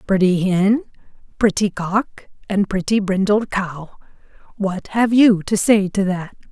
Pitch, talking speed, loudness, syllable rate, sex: 200 Hz, 140 wpm, -18 LUFS, 3.9 syllables/s, female